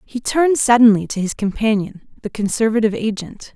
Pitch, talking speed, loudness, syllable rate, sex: 220 Hz, 150 wpm, -17 LUFS, 5.8 syllables/s, female